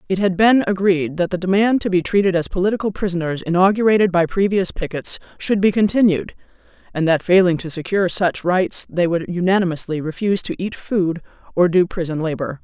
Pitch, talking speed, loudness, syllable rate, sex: 180 Hz, 180 wpm, -18 LUFS, 5.8 syllables/s, female